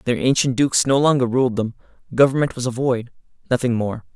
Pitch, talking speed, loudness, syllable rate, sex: 125 Hz, 175 wpm, -19 LUFS, 6.0 syllables/s, male